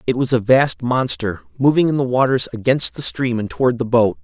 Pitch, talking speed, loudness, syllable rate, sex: 125 Hz, 225 wpm, -18 LUFS, 5.5 syllables/s, male